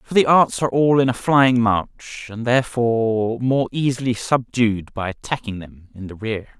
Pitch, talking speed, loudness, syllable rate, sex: 120 Hz, 180 wpm, -19 LUFS, 4.6 syllables/s, male